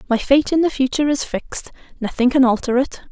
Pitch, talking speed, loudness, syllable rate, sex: 265 Hz, 190 wpm, -18 LUFS, 6.2 syllables/s, female